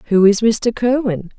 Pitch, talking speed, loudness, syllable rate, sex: 215 Hz, 175 wpm, -16 LUFS, 4.4 syllables/s, female